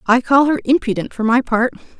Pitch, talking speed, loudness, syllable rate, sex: 245 Hz, 210 wpm, -16 LUFS, 5.6 syllables/s, female